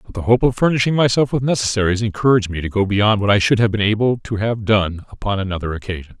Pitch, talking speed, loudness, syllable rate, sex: 105 Hz, 240 wpm, -17 LUFS, 6.7 syllables/s, male